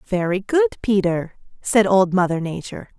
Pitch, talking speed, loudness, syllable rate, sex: 195 Hz, 140 wpm, -19 LUFS, 5.0 syllables/s, female